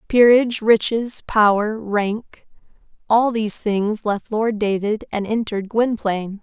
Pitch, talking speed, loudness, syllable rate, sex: 215 Hz, 110 wpm, -19 LUFS, 4.1 syllables/s, female